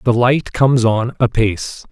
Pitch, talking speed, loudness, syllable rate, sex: 120 Hz, 155 wpm, -16 LUFS, 4.7 syllables/s, male